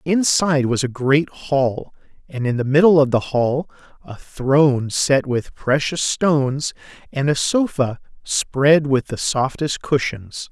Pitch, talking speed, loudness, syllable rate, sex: 140 Hz, 150 wpm, -18 LUFS, 3.8 syllables/s, male